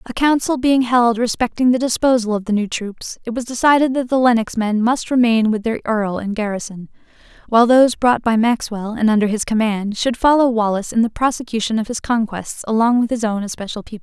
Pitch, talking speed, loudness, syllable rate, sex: 230 Hz, 210 wpm, -17 LUFS, 5.8 syllables/s, female